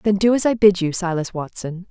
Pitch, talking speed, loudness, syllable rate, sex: 190 Hz, 250 wpm, -19 LUFS, 5.6 syllables/s, female